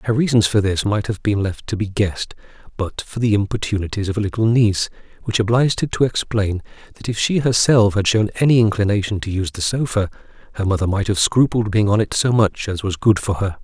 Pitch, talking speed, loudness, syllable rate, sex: 105 Hz, 225 wpm, -19 LUFS, 6.1 syllables/s, male